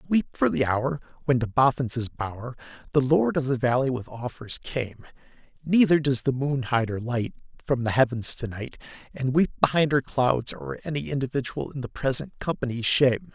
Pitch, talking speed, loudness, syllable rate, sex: 130 Hz, 185 wpm, -25 LUFS, 5.3 syllables/s, male